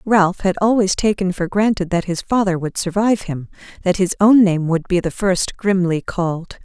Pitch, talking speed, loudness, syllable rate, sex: 190 Hz, 190 wpm, -18 LUFS, 4.9 syllables/s, female